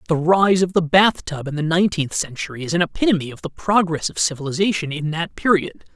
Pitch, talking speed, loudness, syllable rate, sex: 170 Hz, 210 wpm, -19 LUFS, 6.0 syllables/s, male